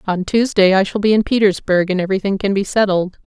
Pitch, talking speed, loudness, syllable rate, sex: 195 Hz, 220 wpm, -16 LUFS, 6.2 syllables/s, female